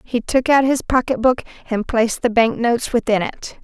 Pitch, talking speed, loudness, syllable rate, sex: 240 Hz, 215 wpm, -18 LUFS, 5.3 syllables/s, female